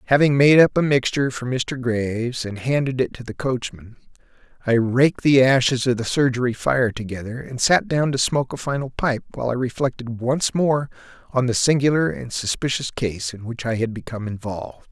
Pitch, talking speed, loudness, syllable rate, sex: 125 Hz, 195 wpm, -21 LUFS, 5.4 syllables/s, male